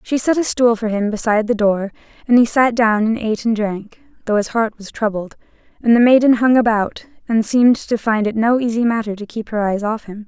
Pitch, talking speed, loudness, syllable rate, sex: 225 Hz, 240 wpm, -17 LUFS, 5.6 syllables/s, female